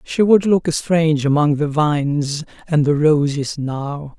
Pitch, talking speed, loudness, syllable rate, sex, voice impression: 150 Hz, 160 wpm, -17 LUFS, 3.9 syllables/s, male, very masculine, old, thick, tensed, slightly powerful, slightly bright, slightly soft, clear, fluent, raspy, cool, intellectual, slightly refreshing, sincere, calm, very mature, slightly friendly, slightly reassuring, slightly unique, slightly elegant, wild, slightly sweet, slightly lively, kind, modest